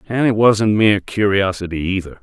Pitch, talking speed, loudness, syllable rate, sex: 100 Hz, 160 wpm, -16 LUFS, 5.3 syllables/s, male